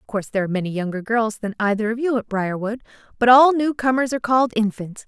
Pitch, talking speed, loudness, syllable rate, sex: 225 Hz, 225 wpm, -20 LUFS, 6.7 syllables/s, female